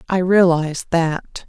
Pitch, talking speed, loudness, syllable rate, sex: 175 Hz, 120 wpm, -17 LUFS, 4.0 syllables/s, female